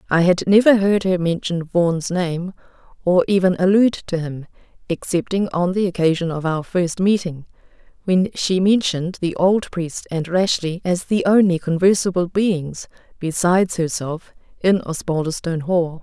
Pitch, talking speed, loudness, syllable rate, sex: 180 Hz, 145 wpm, -19 LUFS, 4.7 syllables/s, female